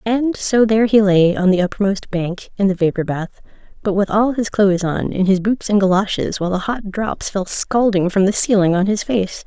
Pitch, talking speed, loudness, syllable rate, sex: 200 Hz, 230 wpm, -17 LUFS, 5.2 syllables/s, female